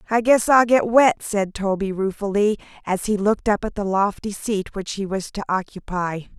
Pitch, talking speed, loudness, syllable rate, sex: 205 Hz, 195 wpm, -21 LUFS, 4.9 syllables/s, female